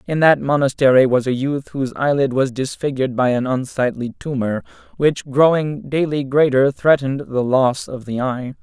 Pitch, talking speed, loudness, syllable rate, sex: 135 Hz, 165 wpm, -18 LUFS, 5.0 syllables/s, male